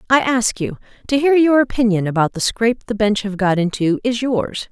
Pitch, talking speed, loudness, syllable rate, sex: 225 Hz, 215 wpm, -17 LUFS, 5.3 syllables/s, female